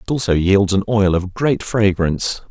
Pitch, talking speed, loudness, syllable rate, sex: 100 Hz, 190 wpm, -17 LUFS, 4.8 syllables/s, male